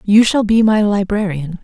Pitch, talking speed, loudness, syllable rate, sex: 205 Hz, 185 wpm, -14 LUFS, 4.6 syllables/s, female